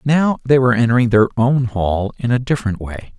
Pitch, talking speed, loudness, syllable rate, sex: 120 Hz, 205 wpm, -16 LUFS, 5.4 syllables/s, male